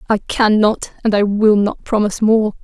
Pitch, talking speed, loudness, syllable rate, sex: 210 Hz, 205 wpm, -15 LUFS, 4.8 syllables/s, female